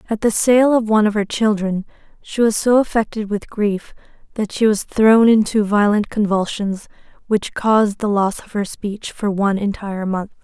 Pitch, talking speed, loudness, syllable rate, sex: 210 Hz, 185 wpm, -17 LUFS, 4.9 syllables/s, female